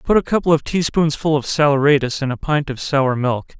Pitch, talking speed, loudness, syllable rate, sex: 145 Hz, 235 wpm, -18 LUFS, 5.5 syllables/s, male